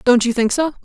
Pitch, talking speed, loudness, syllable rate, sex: 255 Hz, 285 wpm, -17 LUFS, 5.9 syllables/s, female